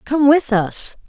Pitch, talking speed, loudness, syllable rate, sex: 260 Hz, 165 wpm, -16 LUFS, 3.3 syllables/s, female